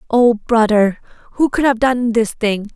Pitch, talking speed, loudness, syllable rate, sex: 230 Hz, 175 wpm, -15 LUFS, 4.3 syllables/s, female